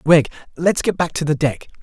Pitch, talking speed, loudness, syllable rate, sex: 155 Hz, 230 wpm, -19 LUFS, 5.4 syllables/s, male